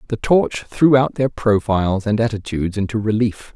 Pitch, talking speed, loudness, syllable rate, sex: 110 Hz, 170 wpm, -18 LUFS, 5.1 syllables/s, male